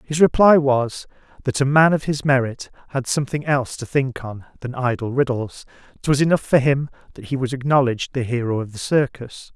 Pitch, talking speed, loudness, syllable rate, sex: 135 Hz, 195 wpm, -20 LUFS, 5.4 syllables/s, male